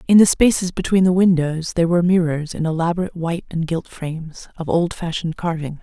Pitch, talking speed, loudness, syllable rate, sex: 170 Hz, 185 wpm, -19 LUFS, 6.1 syllables/s, female